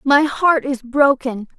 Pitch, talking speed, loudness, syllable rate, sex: 270 Hz, 150 wpm, -17 LUFS, 3.6 syllables/s, female